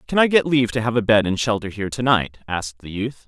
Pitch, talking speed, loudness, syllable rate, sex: 115 Hz, 295 wpm, -20 LUFS, 6.5 syllables/s, male